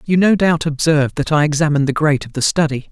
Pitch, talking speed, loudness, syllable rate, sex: 150 Hz, 245 wpm, -16 LUFS, 6.8 syllables/s, male